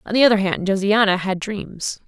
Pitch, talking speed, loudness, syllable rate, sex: 200 Hz, 205 wpm, -19 LUFS, 5.2 syllables/s, female